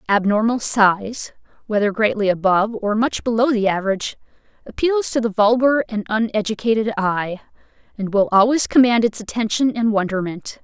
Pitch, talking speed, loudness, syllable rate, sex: 220 Hz, 140 wpm, -19 LUFS, 5.3 syllables/s, female